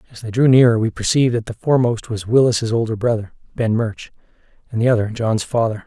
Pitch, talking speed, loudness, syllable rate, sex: 115 Hz, 205 wpm, -18 LUFS, 6.5 syllables/s, male